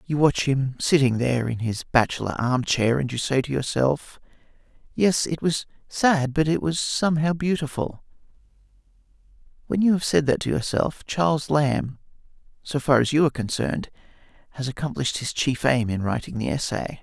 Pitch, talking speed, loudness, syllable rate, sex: 140 Hz, 170 wpm, -23 LUFS, 5.2 syllables/s, male